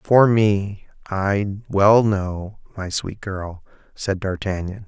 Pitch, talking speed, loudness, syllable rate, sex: 100 Hz, 125 wpm, -20 LUFS, 3.0 syllables/s, male